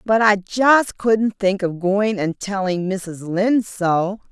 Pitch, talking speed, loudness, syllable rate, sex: 200 Hz, 165 wpm, -19 LUFS, 3.4 syllables/s, female